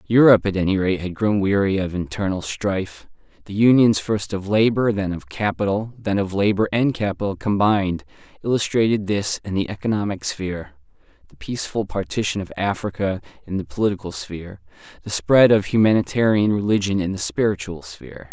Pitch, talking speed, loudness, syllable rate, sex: 100 Hz, 155 wpm, -21 LUFS, 5.6 syllables/s, male